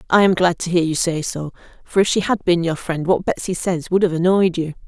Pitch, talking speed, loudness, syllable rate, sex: 175 Hz, 270 wpm, -19 LUFS, 5.6 syllables/s, female